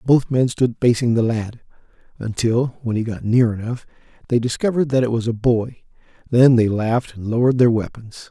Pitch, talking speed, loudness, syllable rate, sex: 120 Hz, 190 wpm, -19 LUFS, 5.5 syllables/s, male